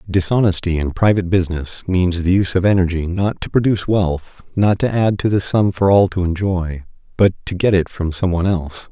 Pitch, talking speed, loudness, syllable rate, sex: 95 Hz, 210 wpm, -17 LUFS, 5.5 syllables/s, male